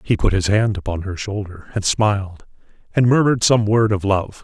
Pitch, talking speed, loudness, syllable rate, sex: 105 Hz, 205 wpm, -18 LUFS, 5.3 syllables/s, male